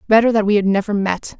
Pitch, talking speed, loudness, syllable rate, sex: 205 Hz, 260 wpm, -17 LUFS, 6.5 syllables/s, female